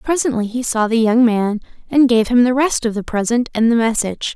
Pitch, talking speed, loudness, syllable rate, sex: 235 Hz, 235 wpm, -16 LUFS, 5.6 syllables/s, female